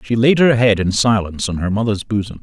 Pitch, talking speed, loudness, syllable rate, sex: 110 Hz, 245 wpm, -16 LUFS, 6.0 syllables/s, male